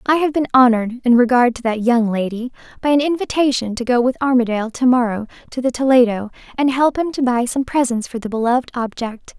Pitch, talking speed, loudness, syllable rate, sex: 245 Hz, 210 wpm, -17 LUFS, 6.0 syllables/s, female